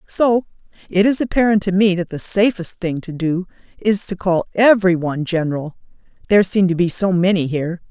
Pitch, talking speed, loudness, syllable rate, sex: 185 Hz, 175 wpm, -17 LUFS, 5.5 syllables/s, female